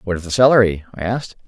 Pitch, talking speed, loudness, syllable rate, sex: 100 Hz, 245 wpm, -17 LUFS, 7.6 syllables/s, male